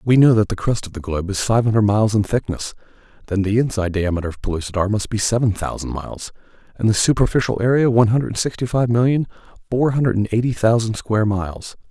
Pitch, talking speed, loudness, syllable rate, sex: 110 Hz, 200 wpm, -19 LUFS, 6.5 syllables/s, male